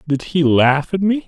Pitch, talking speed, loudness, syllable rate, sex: 165 Hz, 235 wpm, -16 LUFS, 4.4 syllables/s, male